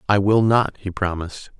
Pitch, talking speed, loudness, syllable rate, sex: 100 Hz, 190 wpm, -20 LUFS, 5.2 syllables/s, male